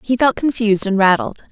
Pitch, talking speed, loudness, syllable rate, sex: 210 Hz, 200 wpm, -16 LUFS, 5.8 syllables/s, female